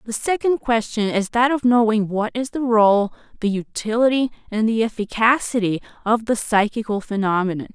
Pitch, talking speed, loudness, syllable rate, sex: 225 Hz, 155 wpm, -20 LUFS, 5.1 syllables/s, female